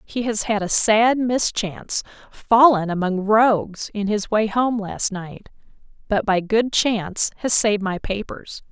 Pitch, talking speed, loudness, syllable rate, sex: 210 Hz, 160 wpm, -20 LUFS, 4.1 syllables/s, female